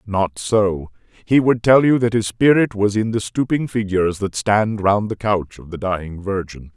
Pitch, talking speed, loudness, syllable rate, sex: 105 Hz, 205 wpm, -18 LUFS, 4.6 syllables/s, male